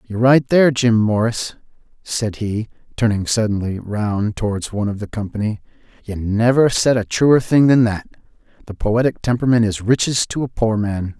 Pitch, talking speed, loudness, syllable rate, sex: 110 Hz, 170 wpm, -18 LUFS, 5.1 syllables/s, male